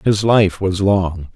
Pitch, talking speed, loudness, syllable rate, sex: 95 Hz, 175 wpm, -16 LUFS, 3.2 syllables/s, male